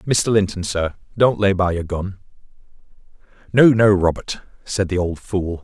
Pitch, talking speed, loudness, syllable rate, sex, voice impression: 95 Hz, 160 wpm, -18 LUFS, 4.5 syllables/s, male, very masculine, very adult-like, middle-aged, very thick, very tensed, powerful, slightly bright, slightly soft, clear, fluent, intellectual, sincere, very calm, slightly mature, very reassuring, slightly elegant, sweet, lively, kind